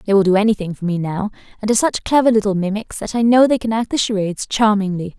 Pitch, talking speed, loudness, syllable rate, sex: 210 Hz, 255 wpm, -17 LUFS, 6.8 syllables/s, female